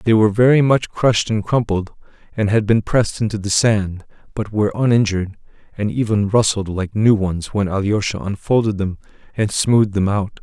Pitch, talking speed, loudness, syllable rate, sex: 105 Hz, 180 wpm, -18 LUFS, 5.4 syllables/s, male